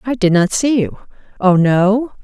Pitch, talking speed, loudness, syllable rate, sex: 205 Hz, 190 wpm, -14 LUFS, 4.4 syllables/s, female